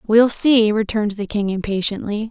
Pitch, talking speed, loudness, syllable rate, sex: 215 Hz, 155 wpm, -18 LUFS, 5.1 syllables/s, female